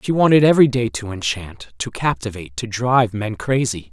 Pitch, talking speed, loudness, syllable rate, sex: 115 Hz, 185 wpm, -19 LUFS, 5.6 syllables/s, male